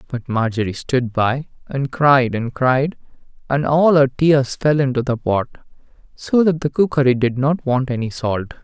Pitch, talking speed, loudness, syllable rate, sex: 135 Hz, 175 wpm, -18 LUFS, 4.3 syllables/s, male